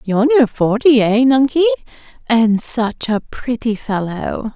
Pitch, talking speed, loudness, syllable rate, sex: 235 Hz, 130 wpm, -15 LUFS, 4.0 syllables/s, female